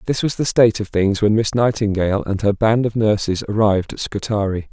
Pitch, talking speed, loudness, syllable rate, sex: 105 Hz, 215 wpm, -18 LUFS, 5.8 syllables/s, male